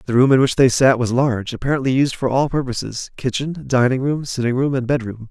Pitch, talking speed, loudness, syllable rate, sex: 130 Hz, 225 wpm, -18 LUFS, 5.9 syllables/s, male